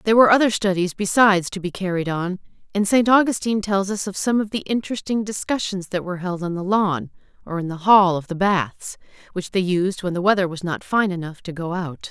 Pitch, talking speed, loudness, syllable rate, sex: 190 Hz, 230 wpm, -21 LUFS, 5.8 syllables/s, female